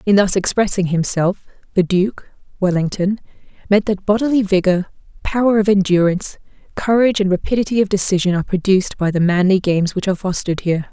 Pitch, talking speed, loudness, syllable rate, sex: 190 Hz, 160 wpm, -17 LUFS, 6.4 syllables/s, female